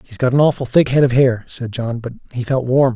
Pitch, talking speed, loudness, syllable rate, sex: 125 Hz, 285 wpm, -16 LUFS, 5.7 syllables/s, male